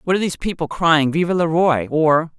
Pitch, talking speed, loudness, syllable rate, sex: 160 Hz, 225 wpm, -18 LUFS, 5.5 syllables/s, female